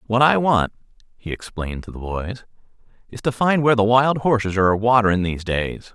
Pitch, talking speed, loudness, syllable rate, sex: 110 Hz, 190 wpm, -19 LUFS, 5.7 syllables/s, male